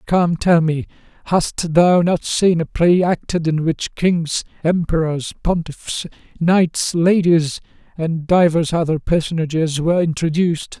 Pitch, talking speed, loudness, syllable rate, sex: 165 Hz, 130 wpm, -17 LUFS, 4.0 syllables/s, male